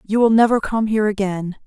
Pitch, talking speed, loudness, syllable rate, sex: 210 Hz, 215 wpm, -18 LUFS, 6.0 syllables/s, female